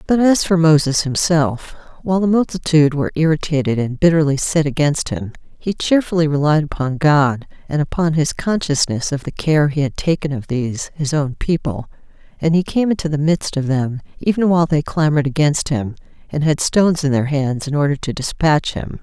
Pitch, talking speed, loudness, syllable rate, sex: 150 Hz, 190 wpm, -17 LUFS, 5.4 syllables/s, female